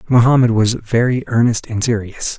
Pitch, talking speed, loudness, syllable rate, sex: 115 Hz, 150 wpm, -15 LUFS, 5.1 syllables/s, male